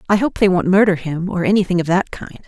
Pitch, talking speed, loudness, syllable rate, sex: 185 Hz, 265 wpm, -16 LUFS, 6.3 syllables/s, female